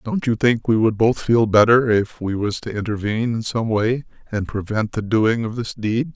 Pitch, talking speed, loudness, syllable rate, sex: 110 Hz, 225 wpm, -20 LUFS, 4.9 syllables/s, male